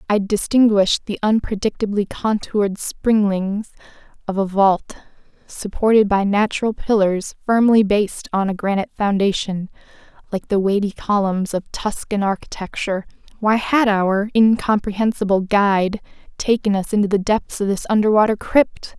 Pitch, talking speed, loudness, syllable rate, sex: 205 Hz, 125 wpm, -19 LUFS, 4.9 syllables/s, female